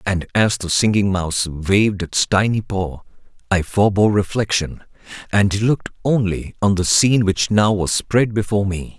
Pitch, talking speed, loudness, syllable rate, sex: 100 Hz, 160 wpm, -18 LUFS, 4.8 syllables/s, male